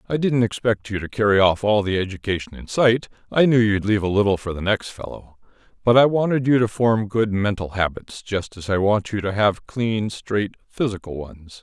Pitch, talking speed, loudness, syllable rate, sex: 105 Hz, 210 wpm, -21 LUFS, 5.2 syllables/s, male